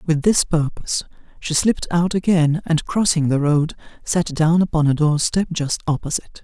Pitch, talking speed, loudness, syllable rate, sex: 160 Hz, 175 wpm, -19 LUFS, 5.1 syllables/s, male